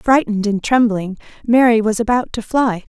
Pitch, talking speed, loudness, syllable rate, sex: 225 Hz, 160 wpm, -16 LUFS, 5.1 syllables/s, female